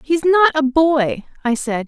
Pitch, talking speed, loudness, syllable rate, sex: 290 Hz, 225 wpm, -16 LUFS, 5.4 syllables/s, female